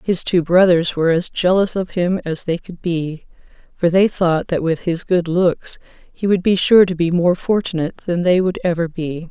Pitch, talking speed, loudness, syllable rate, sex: 175 Hz, 215 wpm, -17 LUFS, 4.7 syllables/s, female